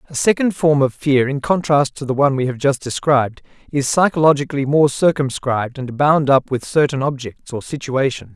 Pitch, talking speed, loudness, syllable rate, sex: 140 Hz, 185 wpm, -17 LUFS, 5.5 syllables/s, male